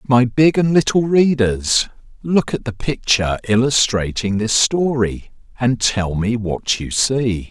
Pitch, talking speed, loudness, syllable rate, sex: 120 Hz, 145 wpm, -17 LUFS, 3.9 syllables/s, male